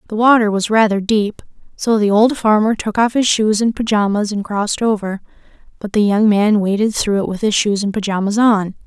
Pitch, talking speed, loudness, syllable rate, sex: 210 Hz, 210 wpm, -15 LUFS, 5.3 syllables/s, female